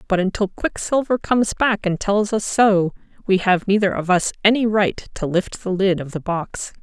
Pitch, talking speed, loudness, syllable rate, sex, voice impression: 200 Hz, 200 wpm, -19 LUFS, 4.7 syllables/s, female, gender-neutral, adult-like, tensed, slightly bright, clear, fluent, intellectual, calm, friendly, unique, lively, kind